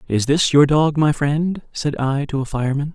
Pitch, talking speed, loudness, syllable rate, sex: 145 Hz, 225 wpm, -18 LUFS, 4.8 syllables/s, male